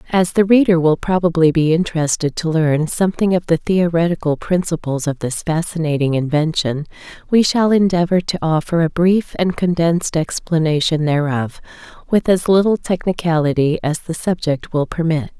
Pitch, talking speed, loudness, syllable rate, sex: 165 Hz, 150 wpm, -17 LUFS, 5.1 syllables/s, female